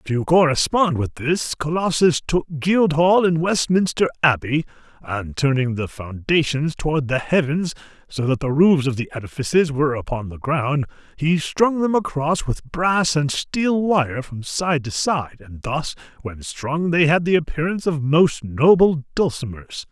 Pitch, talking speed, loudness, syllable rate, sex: 150 Hz, 160 wpm, -20 LUFS, 4.4 syllables/s, male